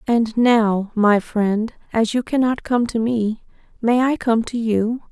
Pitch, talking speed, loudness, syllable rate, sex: 230 Hz, 175 wpm, -19 LUFS, 3.7 syllables/s, female